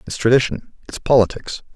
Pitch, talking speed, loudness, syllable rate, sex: 120 Hz, 105 wpm, -17 LUFS, 5.3 syllables/s, male